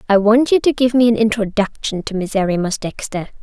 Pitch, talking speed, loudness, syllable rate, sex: 215 Hz, 195 wpm, -16 LUFS, 5.7 syllables/s, female